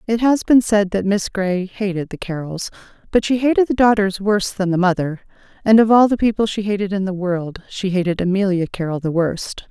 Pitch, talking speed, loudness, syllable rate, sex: 195 Hz, 215 wpm, -18 LUFS, 5.4 syllables/s, female